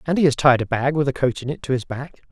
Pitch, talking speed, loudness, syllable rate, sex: 135 Hz, 365 wpm, -20 LUFS, 6.6 syllables/s, male